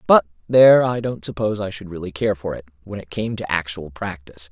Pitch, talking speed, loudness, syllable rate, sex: 95 Hz, 225 wpm, -20 LUFS, 6.0 syllables/s, male